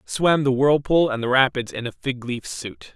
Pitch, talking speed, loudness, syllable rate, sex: 130 Hz, 225 wpm, -21 LUFS, 4.6 syllables/s, male